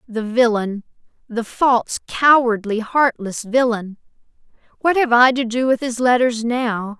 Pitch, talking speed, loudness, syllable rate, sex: 235 Hz, 120 wpm, -18 LUFS, 4.2 syllables/s, female